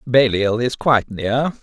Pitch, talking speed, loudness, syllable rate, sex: 120 Hz, 150 wpm, -18 LUFS, 4.2 syllables/s, male